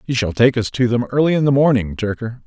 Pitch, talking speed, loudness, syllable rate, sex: 120 Hz, 270 wpm, -17 LUFS, 6.3 syllables/s, male